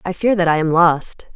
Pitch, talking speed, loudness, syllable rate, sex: 175 Hz, 265 wpm, -16 LUFS, 5.1 syllables/s, female